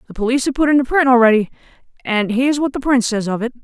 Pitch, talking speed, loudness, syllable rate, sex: 250 Hz, 250 wpm, -16 LUFS, 7.4 syllables/s, female